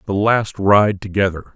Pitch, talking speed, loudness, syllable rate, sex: 100 Hz, 155 wpm, -17 LUFS, 4.6 syllables/s, male